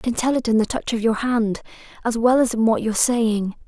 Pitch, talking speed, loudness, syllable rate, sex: 230 Hz, 275 wpm, -20 LUFS, 5.8 syllables/s, female